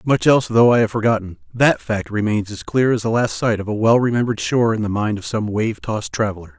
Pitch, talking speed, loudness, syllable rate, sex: 110 Hz, 255 wpm, -18 LUFS, 6.2 syllables/s, male